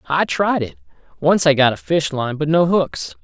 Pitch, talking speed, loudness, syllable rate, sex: 150 Hz, 225 wpm, -17 LUFS, 4.6 syllables/s, male